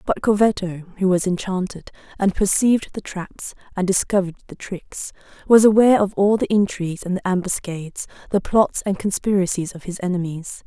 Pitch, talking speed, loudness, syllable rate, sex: 190 Hz, 165 wpm, -20 LUFS, 5.5 syllables/s, female